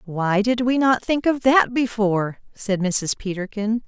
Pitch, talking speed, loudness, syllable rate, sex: 220 Hz, 170 wpm, -21 LUFS, 4.2 syllables/s, female